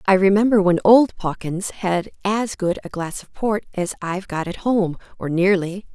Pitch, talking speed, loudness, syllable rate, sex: 190 Hz, 180 wpm, -20 LUFS, 4.7 syllables/s, female